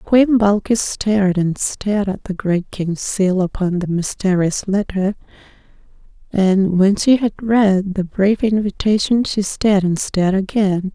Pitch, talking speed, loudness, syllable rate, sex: 195 Hz, 150 wpm, -17 LUFS, 4.1 syllables/s, female